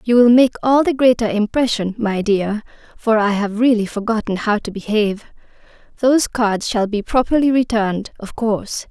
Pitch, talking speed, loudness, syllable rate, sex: 225 Hz, 170 wpm, -17 LUFS, 5.1 syllables/s, female